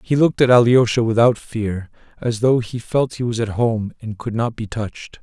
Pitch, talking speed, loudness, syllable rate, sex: 115 Hz, 220 wpm, -19 LUFS, 5.0 syllables/s, male